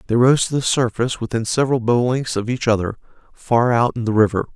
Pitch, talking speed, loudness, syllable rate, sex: 120 Hz, 225 wpm, -18 LUFS, 6.1 syllables/s, male